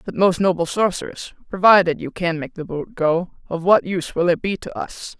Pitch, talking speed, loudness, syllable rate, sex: 175 Hz, 220 wpm, -20 LUFS, 5.2 syllables/s, female